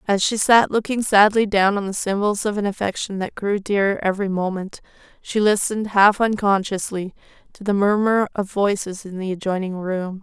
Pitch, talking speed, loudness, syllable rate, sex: 200 Hz, 175 wpm, -20 LUFS, 5.2 syllables/s, female